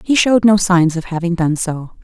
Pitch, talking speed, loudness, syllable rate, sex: 180 Hz, 235 wpm, -15 LUFS, 5.3 syllables/s, female